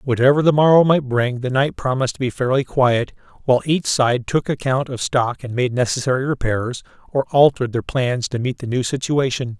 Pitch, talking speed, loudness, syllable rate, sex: 130 Hz, 200 wpm, -19 LUFS, 5.4 syllables/s, male